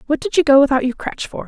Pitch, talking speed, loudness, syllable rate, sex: 275 Hz, 325 wpm, -16 LUFS, 6.9 syllables/s, female